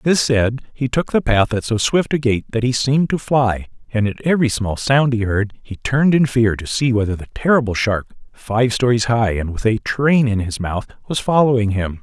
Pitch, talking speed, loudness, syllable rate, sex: 120 Hz, 230 wpm, -18 LUFS, 5.1 syllables/s, male